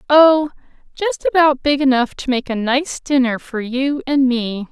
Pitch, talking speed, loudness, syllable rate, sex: 270 Hz, 180 wpm, -17 LUFS, 4.3 syllables/s, female